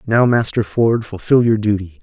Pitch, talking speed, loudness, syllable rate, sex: 110 Hz, 180 wpm, -16 LUFS, 4.8 syllables/s, male